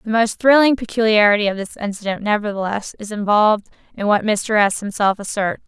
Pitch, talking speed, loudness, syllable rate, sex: 210 Hz, 170 wpm, -18 LUFS, 5.7 syllables/s, female